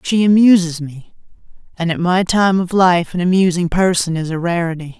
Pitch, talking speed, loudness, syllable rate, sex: 175 Hz, 180 wpm, -15 LUFS, 5.2 syllables/s, female